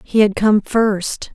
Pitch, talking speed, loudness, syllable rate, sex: 210 Hz, 180 wpm, -16 LUFS, 3.2 syllables/s, female